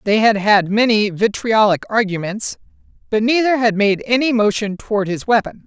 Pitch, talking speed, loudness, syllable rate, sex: 215 Hz, 160 wpm, -16 LUFS, 5.0 syllables/s, female